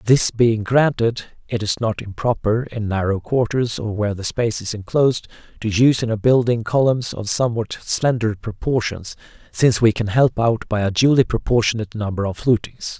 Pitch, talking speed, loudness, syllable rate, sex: 115 Hz, 175 wpm, -19 LUFS, 5.2 syllables/s, male